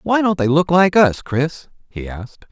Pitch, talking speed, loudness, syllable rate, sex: 155 Hz, 215 wpm, -16 LUFS, 4.6 syllables/s, male